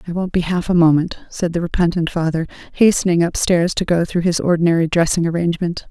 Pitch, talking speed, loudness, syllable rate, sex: 170 Hz, 205 wpm, -17 LUFS, 6.1 syllables/s, female